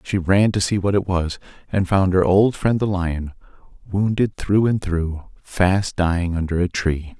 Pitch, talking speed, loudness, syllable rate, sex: 95 Hz, 190 wpm, -20 LUFS, 4.3 syllables/s, male